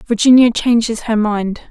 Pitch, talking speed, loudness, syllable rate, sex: 225 Hz, 140 wpm, -13 LUFS, 4.5 syllables/s, female